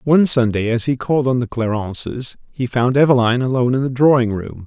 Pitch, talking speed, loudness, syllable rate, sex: 125 Hz, 205 wpm, -17 LUFS, 6.0 syllables/s, male